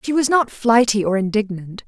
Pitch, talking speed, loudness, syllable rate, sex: 220 Hz, 190 wpm, -18 LUFS, 5.2 syllables/s, female